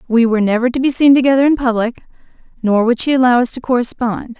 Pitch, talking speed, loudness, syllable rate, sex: 245 Hz, 220 wpm, -14 LUFS, 6.7 syllables/s, female